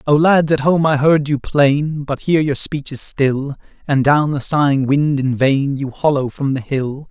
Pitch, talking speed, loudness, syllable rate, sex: 140 Hz, 220 wpm, -16 LUFS, 4.4 syllables/s, male